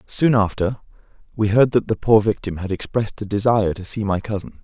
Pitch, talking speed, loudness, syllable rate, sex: 105 Hz, 205 wpm, -20 LUFS, 5.8 syllables/s, male